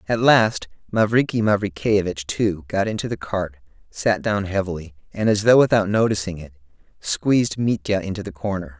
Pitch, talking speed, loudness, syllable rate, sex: 95 Hz, 155 wpm, -21 LUFS, 5.1 syllables/s, male